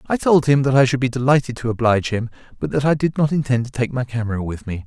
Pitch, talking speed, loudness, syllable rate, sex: 125 Hz, 285 wpm, -19 LUFS, 6.7 syllables/s, male